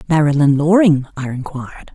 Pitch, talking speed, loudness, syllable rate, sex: 150 Hz, 125 wpm, -15 LUFS, 6.2 syllables/s, female